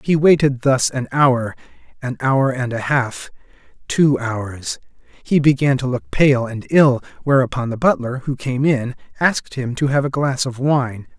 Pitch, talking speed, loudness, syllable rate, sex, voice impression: 130 Hz, 175 wpm, -18 LUFS, 4.3 syllables/s, male, masculine, slightly old, slightly raspy, slightly refreshing, sincere, kind